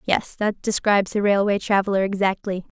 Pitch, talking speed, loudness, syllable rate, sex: 200 Hz, 150 wpm, -21 LUFS, 5.5 syllables/s, female